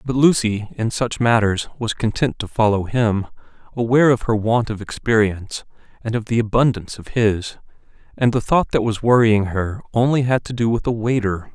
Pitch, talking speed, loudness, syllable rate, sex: 115 Hz, 185 wpm, -19 LUFS, 5.2 syllables/s, male